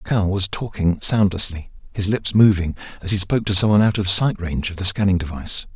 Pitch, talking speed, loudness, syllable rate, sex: 95 Hz, 210 wpm, -19 LUFS, 6.3 syllables/s, male